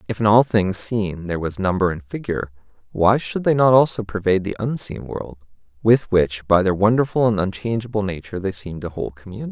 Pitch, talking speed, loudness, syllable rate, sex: 105 Hz, 200 wpm, -20 LUFS, 5.9 syllables/s, male